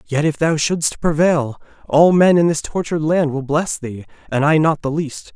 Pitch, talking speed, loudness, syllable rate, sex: 155 Hz, 215 wpm, -17 LUFS, 4.7 syllables/s, male